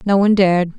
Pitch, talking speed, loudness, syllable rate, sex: 190 Hz, 230 wpm, -14 LUFS, 7.6 syllables/s, female